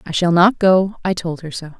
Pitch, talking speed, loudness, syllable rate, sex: 175 Hz, 235 wpm, -16 LUFS, 5.2 syllables/s, female